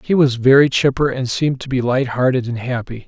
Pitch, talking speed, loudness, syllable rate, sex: 130 Hz, 215 wpm, -17 LUFS, 5.7 syllables/s, male